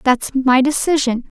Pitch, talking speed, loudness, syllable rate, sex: 265 Hz, 130 wpm, -16 LUFS, 4.2 syllables/s, female